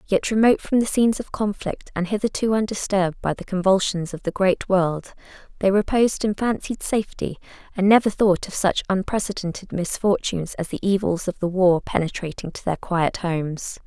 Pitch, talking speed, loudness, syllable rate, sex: 190 Hz, 175 wpm, -22 LUFS, 5.5 syllables/s, female